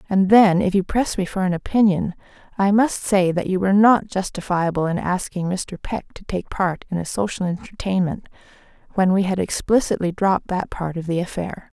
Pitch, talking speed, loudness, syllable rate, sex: 190 Hz, 195 wpm, -20 LUFS, 5.3 syllables/s, female